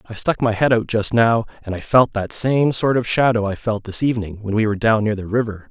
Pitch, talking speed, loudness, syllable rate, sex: 110 Hz, 275 wpm, -18 LUFS, 5.7 syllables/s, male